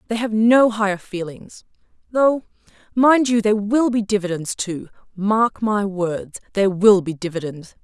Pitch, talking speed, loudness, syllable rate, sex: 205 Hz, 155 wpm, -19 LUFS, 4.5 syllables/s, female